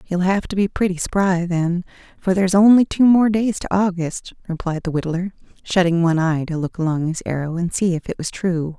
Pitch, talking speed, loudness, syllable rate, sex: 180 Hz, 220 wpm, -19 LUFS, 5.4 syllables/s, female